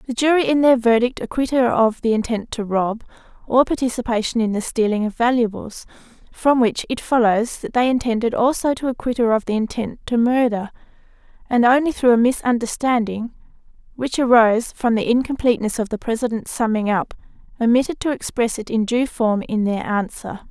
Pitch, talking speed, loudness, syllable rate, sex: 235 Hz, 175 wpm, -19 LUFS, 5.5 syllables/s, female